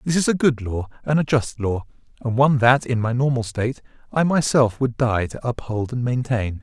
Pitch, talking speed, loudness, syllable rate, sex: 125 Hz, 215 wpm, -21 LUFS, 5.2 syllables/s, male